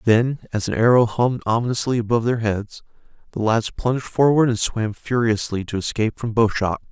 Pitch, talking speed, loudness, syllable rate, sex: 115 Hz, 180 wpm, -20 LUFS, 5.6 syllables/s, male